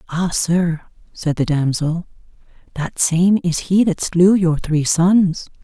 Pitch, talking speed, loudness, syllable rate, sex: 170 Hz, 150 wpm, -17 LUFS, 3.7 syllables/s, female